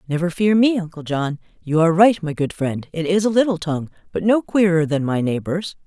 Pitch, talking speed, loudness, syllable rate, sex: 170 Hz, 225 wpm, -19 LUFS, 5.6 syllables/s, female